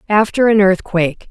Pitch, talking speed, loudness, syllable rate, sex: 200 Hz, 140 wpm, -14 LUFS, 5.3 syllables/s, female